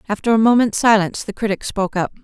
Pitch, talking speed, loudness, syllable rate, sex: 210 Hz, 215 wpm, -17 LUFS, 7.1 syllables/s, female